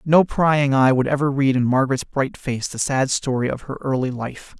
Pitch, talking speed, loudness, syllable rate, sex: 135 Hz, 220 wpm, -20 LUFS, 5.0 syllables/s, male